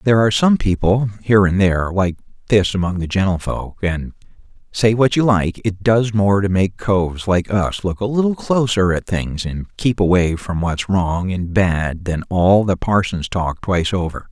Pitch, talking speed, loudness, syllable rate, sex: 95 Hz, 195 wpm, -18 LUFS, 4.7 syllables/s, male